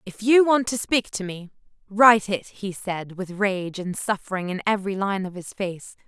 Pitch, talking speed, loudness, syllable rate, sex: 200 Hz, 210 wpm, -23 LUFS, 4.8 syllables/s, female